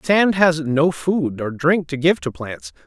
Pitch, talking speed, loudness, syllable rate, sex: 150 Hz, 210 wpm, -18 LUFS, 3.8 syllables/s, male